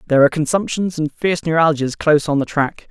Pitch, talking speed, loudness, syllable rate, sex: 155 Hz, 205 wpm, -17 LUFS, 6.6 syllables/s, male